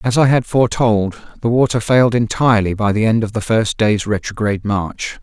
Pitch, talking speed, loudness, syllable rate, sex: 110 Hz, 195 wpm, -16 LUFS, 5.4 syllables/s, male